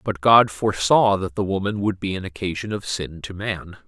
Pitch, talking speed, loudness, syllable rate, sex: 95 Hz, 215 wpm, -21 LUFS, 5.1 syllables/s, male